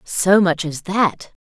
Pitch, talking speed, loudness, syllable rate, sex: 180 Hz, 165 wpm, -17 LUFS, 3.2 syllables/s, female